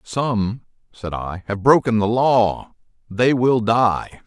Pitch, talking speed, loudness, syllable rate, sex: 110 Hz, 140 wpm, -19 LUFS, 3.1 syllables/s, male